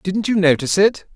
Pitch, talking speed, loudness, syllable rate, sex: 190 Hz, 210 wpm, -16 LUFS, 5.7 syllables/s, male